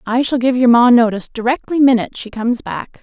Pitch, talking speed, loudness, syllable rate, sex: 245 Hz, 220 wpm, -14 LUFS, 6.2 syllables/s, female